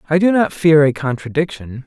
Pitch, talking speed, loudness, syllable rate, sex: 150 Hz, 195 wpm, -15 LUFS, 5.4 syllables/s, male